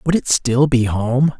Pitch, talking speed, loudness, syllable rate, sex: 130 Hz, 215 wpm, -16 LUFS, 3.9 syllables/s, male